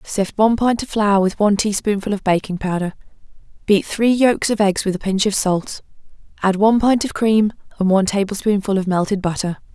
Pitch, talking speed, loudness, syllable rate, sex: 200 Hz, 195 wpm, -18 LUFS, 5.6 syllables/s, female